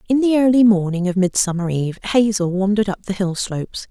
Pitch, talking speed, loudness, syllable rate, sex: 200 Hz, 200 wpm, -18 LUFS, 6.0 syllables/s, female